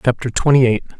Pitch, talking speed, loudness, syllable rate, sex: 125 Hz, 180 wpm, -15 LUFS, 6.6 syllables/s, male